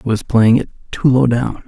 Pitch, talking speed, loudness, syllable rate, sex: 120 Hz, 250 wpm, -14 LUFS, 5.0 syllables/s, male